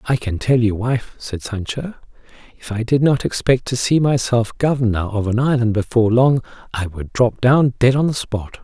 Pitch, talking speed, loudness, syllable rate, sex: 120 Hz, 200 wpm, -18 LUFS, 5.0 syllables/s, male